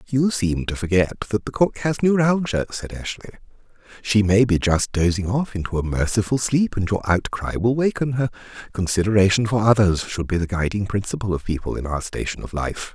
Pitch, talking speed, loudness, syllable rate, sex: 105 Hz, 195 wpm, -21 LUFS, 5.3 syllables/s, male